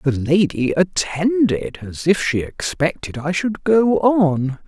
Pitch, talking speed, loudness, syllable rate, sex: 170 Hz, 140 wpm, -18 LUFS, 3.5 syllables/s, male